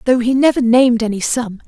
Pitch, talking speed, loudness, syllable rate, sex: 240 Hz, 215 wpm, -14 LUFS, 6.0 syllables/s, female